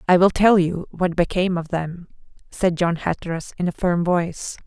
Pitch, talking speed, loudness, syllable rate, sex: 175 Hz, 195 wpm, -21 LUFS, 5.1 syllables/s, female